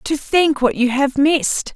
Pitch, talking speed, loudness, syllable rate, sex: 285 Hz, 205 wpm, -16 LUFS, 4.1 syllables/s, female